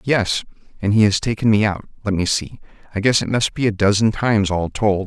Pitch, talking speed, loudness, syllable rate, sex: 105 Hz, 235 wpm, -18 LUFS, 5.6 syllables/s, male